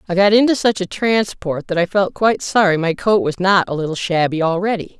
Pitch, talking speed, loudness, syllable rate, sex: 190 Hz, 230 wpm, -17 LUFS, 5.6 syllables/s, female